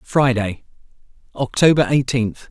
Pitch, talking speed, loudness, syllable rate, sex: 125 Hz, 70 wpm, -18 LUFS, 4.2 syllables/s, male